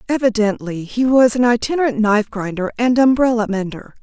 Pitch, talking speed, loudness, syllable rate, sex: 225 Hz, 150 wpm, -16 LUFS, 5.7 syllables/s, female